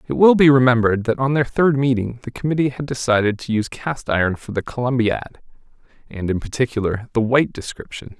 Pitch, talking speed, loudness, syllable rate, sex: 125 Hz, 190 wpm, -19 LUFS, 6.2 syllables/s, male